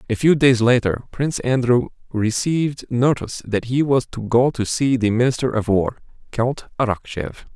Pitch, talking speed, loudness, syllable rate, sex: 120 Hz, 165 wpm, -20 LUFS, 5.0 syllables/s, male